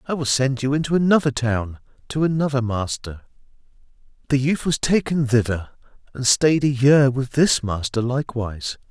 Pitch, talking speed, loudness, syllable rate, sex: 130 Hz, 155 wpm, -20 LUFS, 5.0 syllables/s, male